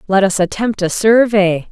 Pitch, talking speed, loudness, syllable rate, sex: 200 Hz, 175 wpm, -14 LUFS, 4.6 syllables/s, female